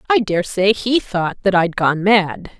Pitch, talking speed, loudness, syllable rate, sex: 200 Hz, 185 wpm, -17 LUFS, 4.4 syllables/s, female